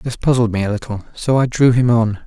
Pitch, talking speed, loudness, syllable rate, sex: 115 Hz, 265 wpm, -16 LUFS, 5.6 syllables/s, male